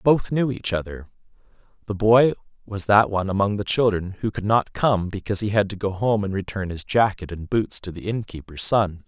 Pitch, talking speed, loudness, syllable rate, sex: 100 Hz, 210 wpm, -22 LUFS, 5.3 syllables/s, male